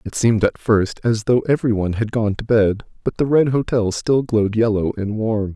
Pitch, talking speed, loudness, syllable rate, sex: 110 Hz, 215 wpm, -19 LUFS, 5.2 syllables/s, male